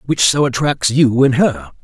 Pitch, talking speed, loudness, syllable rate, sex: 130 Hz, 195 wpm, -14 LUFS, 4.4 syllables/s, male